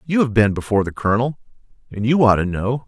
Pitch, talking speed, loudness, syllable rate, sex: 115 Hz, 230 wpm, -18 LUFS, 6.8 syllables/s, male